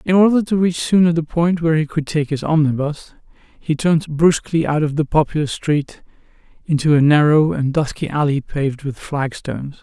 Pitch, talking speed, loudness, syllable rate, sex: 155 Hz, 185 wpm, -17 LUFS, 5.4 syllables/s, male